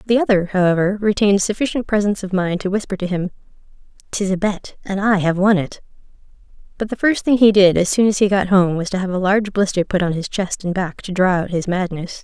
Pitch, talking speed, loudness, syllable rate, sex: 195 Hz, 240 wpm, -18 LUFS, 6.1 syllables/s, female